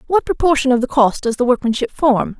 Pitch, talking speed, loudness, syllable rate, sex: 265 Hz, 225 wpm, -16 LUFS, 5.8 syllables/s, female